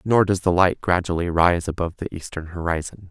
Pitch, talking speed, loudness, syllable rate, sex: 90 Hz, 195 wpm, -22 LUFS, 5.7 syllables/s, male